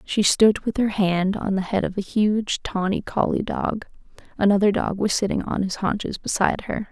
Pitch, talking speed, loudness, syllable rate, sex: 200 Hz, 200 wpm, -22 LUFS, 4.9 syllables/s, female